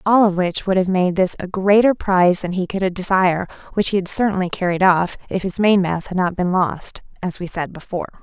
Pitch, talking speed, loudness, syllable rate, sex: 185 Hz, 235 wpm, -18 LUFS, 5.6 syllables/s, female